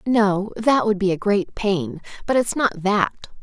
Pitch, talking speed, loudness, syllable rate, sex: 200 Hz, 195 wpm, -20 LUFS, 4.1 syllables/s, female